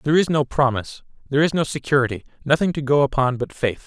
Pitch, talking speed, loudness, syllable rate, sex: 135 Hz, 200 wpm, -20 LUFS, 6.9 syllables/s, male